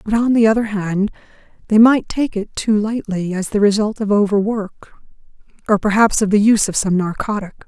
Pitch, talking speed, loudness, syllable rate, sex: 210 Hz, 190 wpm, -16 LUFS, 5.6 syllables/s, female